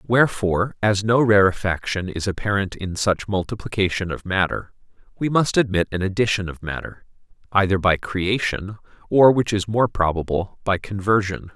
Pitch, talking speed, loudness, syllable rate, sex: 100 Hz, 145 wpm, -21 LUFS, 5.1 syllables/s, male